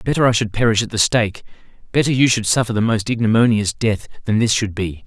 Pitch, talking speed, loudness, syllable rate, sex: 110 Hz, 215 wpm, -17 LUFS, 6.3 syllables/s, male